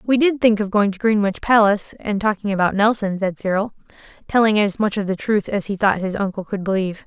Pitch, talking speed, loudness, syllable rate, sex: 205 Hz, 230 wpm, -19 LUFS, 5.9 syllables/s, female